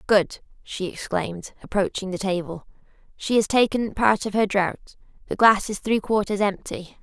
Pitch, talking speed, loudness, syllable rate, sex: 200 Hz, 160 wpm, -23 LUFS, 4.7 syllables/s, female